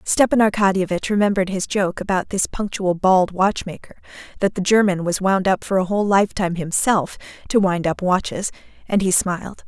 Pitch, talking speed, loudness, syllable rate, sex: 190 Hz, 175 wpm, -19 LUFS, 5.6 syllables/s, female